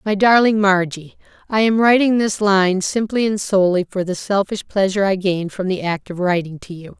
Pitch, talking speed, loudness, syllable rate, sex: 195 Hz, 195 wpm, -17 LUFS, 5.2 syllables/s, female